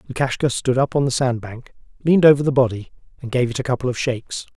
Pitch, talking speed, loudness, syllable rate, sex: 130 Hz, 225 wpm, -19 LUFS, 6.7 syllables/s, male